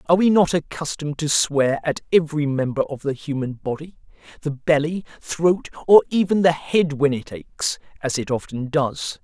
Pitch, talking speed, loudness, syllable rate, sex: 150 Hz, 175 wpm, -21 LUFS, 5.2 syllables/s, male